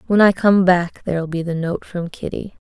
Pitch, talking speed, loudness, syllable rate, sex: 180 Hz, 225 wpm, -18 LUFS, 5.0 syllables/s, female